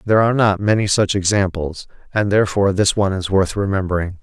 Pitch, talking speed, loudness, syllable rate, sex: 95 Hz, 185 wpm, -17 LUFS, 6.4 syllables/s, male